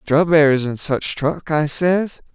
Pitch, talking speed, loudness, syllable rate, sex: 150 Hz, 155 wpm, -18 LUFS, 3.7 syllables/s, male